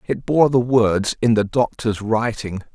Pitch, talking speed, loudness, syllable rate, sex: 115 Hz, 175 wpm, -19 LUFS, 4.0 syllables/s, male